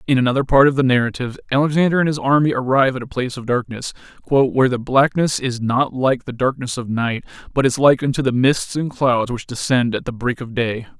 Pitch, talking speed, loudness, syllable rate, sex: 130 Hz, 225 wpm, -18 LUFS, 5.9 syllables/s, male